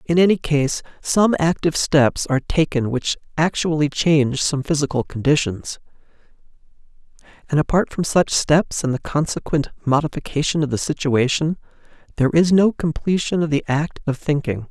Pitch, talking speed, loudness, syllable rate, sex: 150 Hz, 145 wpm, -19 LUFS, 5.1 syllables/s, male